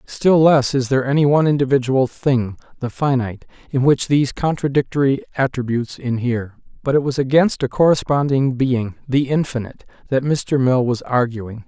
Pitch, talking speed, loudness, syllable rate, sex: 130 Hz, 155 wpm, -18 LUFS, 5.5 syllables/s, male